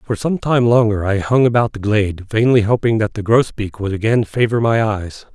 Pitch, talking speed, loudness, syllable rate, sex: 110 Hz, 215 wpm, -16 LUFS, 5.2 syllables/s, male